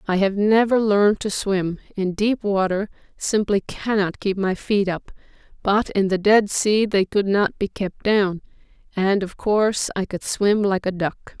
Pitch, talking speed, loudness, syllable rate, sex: 200 Hz, 185 wpm, -21 LUFS, 4.4 syllables/s, female